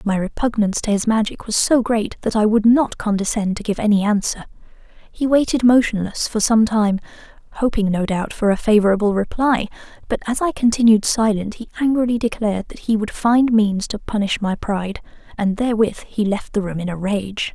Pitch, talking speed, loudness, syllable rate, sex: 215 Hz, 190 wpm, -19 LUFS, 5.5 syllables/s, female